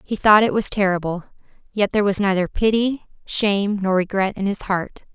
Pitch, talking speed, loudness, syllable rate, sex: 200 Hz, 185 wpm, -19 LUFS, 5.4 syllables/s, female